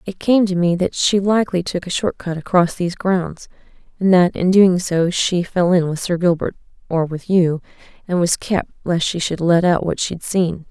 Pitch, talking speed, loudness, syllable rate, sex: 180 Hz, 205 wpm, -18 LUFS, 4.8 syllables/s, female